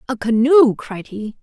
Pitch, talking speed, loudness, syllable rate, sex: 235 Hz, 170 wpm, -14 LUFS, 4.2 syllables/s, female